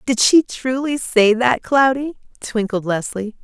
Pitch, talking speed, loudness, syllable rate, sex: 240 Hz, 140 wpm, -17 LUFS, 3.9 syllables/s, female